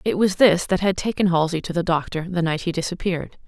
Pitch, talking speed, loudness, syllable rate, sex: 175 Hz, 240 wpm, -21 LUFS, 6.1 syllables/s, female